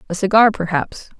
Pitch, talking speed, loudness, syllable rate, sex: 190 Hz, 150 wpm, -16 LUFS, 5.4 syllables/s, female